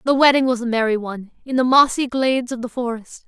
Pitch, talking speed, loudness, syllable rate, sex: 245 Hz, 240 wpm, -18 LUFS, 6.3 syllables/s, female